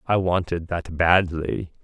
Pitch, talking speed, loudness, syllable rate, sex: 85 Hz, 130 wpm, -22 LUFS, 3.7 syllables/s, male